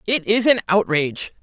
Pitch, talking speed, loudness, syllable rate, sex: 195 Hz, 170 wpm, -18 LUFS, 5.2 syllables/s, female